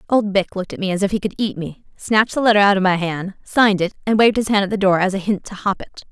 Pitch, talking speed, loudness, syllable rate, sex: 200 Hz, 325 wpm, -18 LUFS, 6.9 syllables/s, female